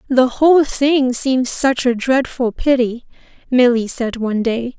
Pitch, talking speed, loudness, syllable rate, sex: 250 Hz, 150 wpm, -16 LUFS, 4.1 syllables/s, female